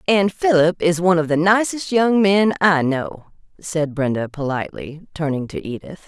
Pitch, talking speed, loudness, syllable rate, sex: 170 Hz, 170 wpm, -18 LUFS, 4.9 syllables/s, female